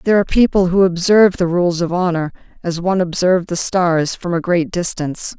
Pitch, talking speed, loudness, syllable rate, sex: 175 Hz, 200 wpm, -16 LUFS, 5.9 syllables/s, female